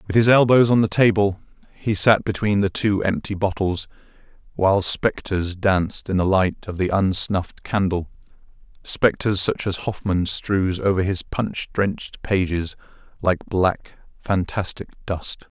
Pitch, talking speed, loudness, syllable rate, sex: 95 Hz, 140 wpm, -21 LUFS, 4.3 syllables/s, male